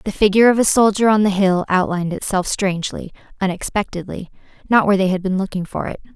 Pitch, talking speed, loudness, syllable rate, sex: 195 Hz, 195 wpm, -18 LUFS, 6.5 syllables/s, female